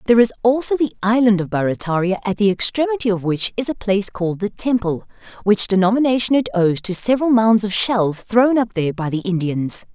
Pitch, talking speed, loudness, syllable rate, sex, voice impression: 210 Hz, 200 wpm, -18 LUFS, 5.9 syllables/s, female, feminine, adult-like, tensed, slightly powerful, clear, fluent, intellectual, slightly friendly, elegant, lively, slightly strict, slightly sharp